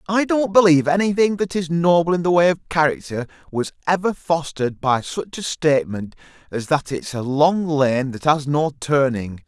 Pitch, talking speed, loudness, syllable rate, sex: 155 Hz, 185 wpm, -19 LUFS, 5.0 syllables/s, male